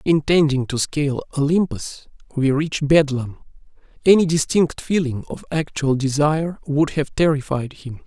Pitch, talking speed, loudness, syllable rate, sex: 145 Hz, 125 wpm, -20 LUFS, 4.6 syllables/s, male